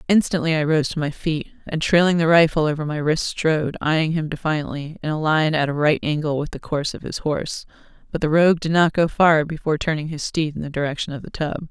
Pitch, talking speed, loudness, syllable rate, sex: 155 Hz, 240 wpm, -21 LUFS, 6.0 syllables/s, female